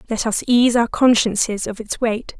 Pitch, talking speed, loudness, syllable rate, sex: 225 Hz, 200 wpm, -18 LUFS, 4.7 syllables/s, female